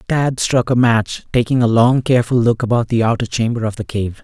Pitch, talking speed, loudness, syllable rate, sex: 120 Hz, 225 wpm, -16 LUFS, 5.5 syllables/s, male